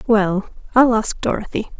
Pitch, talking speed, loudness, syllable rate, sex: 215 Hz, 135 wpm, -18 LUFS, 4.5 syllables/s, female